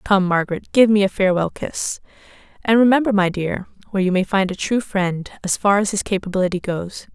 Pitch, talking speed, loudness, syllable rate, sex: 195 Hz, 200 wpm, -19 LUFS, 5.9 syllables/s, female